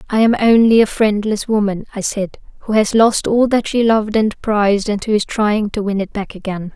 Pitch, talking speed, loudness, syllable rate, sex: 210 Hz, 230 wpm, -16 LUFS, 5.2 syllables/s, female